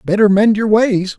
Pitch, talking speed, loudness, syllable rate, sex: 210 Hz, 205 wpm, -13 LUFS, 4.6 syllables/s, male